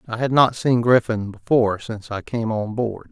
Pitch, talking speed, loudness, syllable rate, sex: 115 Hz, 210 wpm, -20 LUFS, 5.1 syllables/s, male